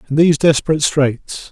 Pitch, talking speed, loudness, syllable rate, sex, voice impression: 150 Hz, 160 wpm, -15 LUFS, 6.2 syllables/s, male, masculine, middle-aged, slightly relaxed, slightly powerful, slightly bright, soft, raspy, slightly intellectual, slightly mature, friendly, reassuring, wild, slightly lively, slightly strict